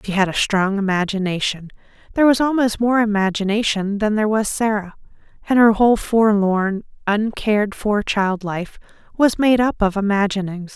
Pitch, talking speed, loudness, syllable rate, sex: 210 Hz, 150 wpm, -18 LUFS, 5.1 syllables/s, female